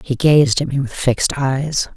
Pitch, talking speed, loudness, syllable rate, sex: 135 Hz, 215 wpm, -17 LUFS, 4.4 syllables/s, female